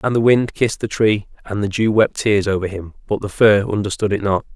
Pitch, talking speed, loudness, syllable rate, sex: 105 Hz, 250 wpm, -18 LUFS, 5.7 syllables/s, male